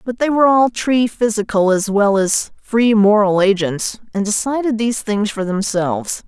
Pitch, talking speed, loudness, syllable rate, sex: 215 Hz, 170 wpm, -16 LUFS, 4.7 syllables/s, female